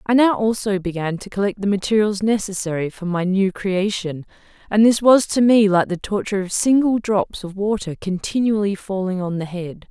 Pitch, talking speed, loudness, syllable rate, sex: 200 Hz, 190 wpm, -19 LUFS, 5.2 syllables/s, female